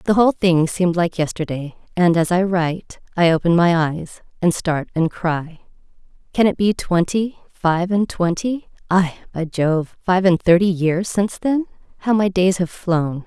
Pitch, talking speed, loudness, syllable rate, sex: 180 Hz, 175 wpm, -19 LUFS, 4.4 syllables/s, female